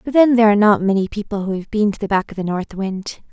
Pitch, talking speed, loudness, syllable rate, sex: 205 Hz, 305 wpm, -17 LUFS, 6.7 syllables/s, female